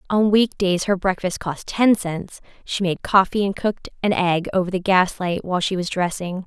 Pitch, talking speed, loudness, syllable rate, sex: 185 Hz, 205 wpm, -21 LUFS, 4.9 syllables/s, female